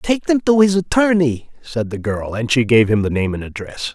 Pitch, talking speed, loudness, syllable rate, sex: 140 Hz, 245 wpm, -17 LUFS, 5.0 syllables/s, male